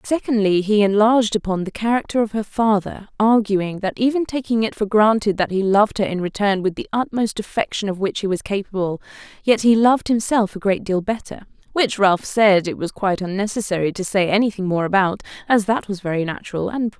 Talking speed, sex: 210 wpm, female